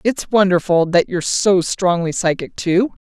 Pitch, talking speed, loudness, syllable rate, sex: 185 Hz, 155 wpm, -17 LUFS, 4.5 syllables/s, female